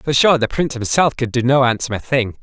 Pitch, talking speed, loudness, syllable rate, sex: 130 Hz, 245 wpm, -17 LUFS, 5.9 syllables/s, male